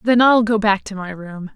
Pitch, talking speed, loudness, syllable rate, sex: 210 Hz, 270 wpm, -16 LUFS, 4.8 syllables/s, female